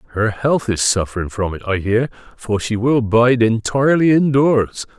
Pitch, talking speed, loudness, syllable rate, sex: 115 Hz, 170 wpm, -17 LUFS, 4.6 syllables/s, male